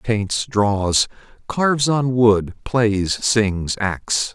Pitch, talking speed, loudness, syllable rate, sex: 110 Hz, 110 wpm, -19 LUFS, 2.4 syllables/s, male